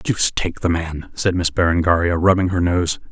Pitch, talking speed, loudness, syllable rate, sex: 85 Hz, 190 wpm, -18 LUFS, 5.2 syllables/s, male